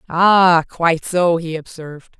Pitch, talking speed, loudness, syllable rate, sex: 170 Hz, 135 wpm, -15 LUFS, 4.0 syllables/s, female